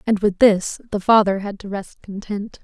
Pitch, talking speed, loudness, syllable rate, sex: 200 Hz, 205 wpm, -19 LUFS, 4.6 syllables/s, female